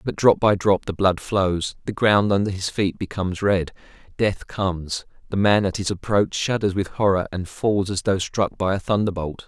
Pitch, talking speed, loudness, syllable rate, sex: 95 Hz, 205 wpm, -22 LUFS, 4.8 syllables/s, male